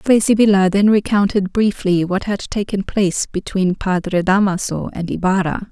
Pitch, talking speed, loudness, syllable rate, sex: 195 Hz, 145 wpm, -17 LUFS, 4.9 syllables/s, female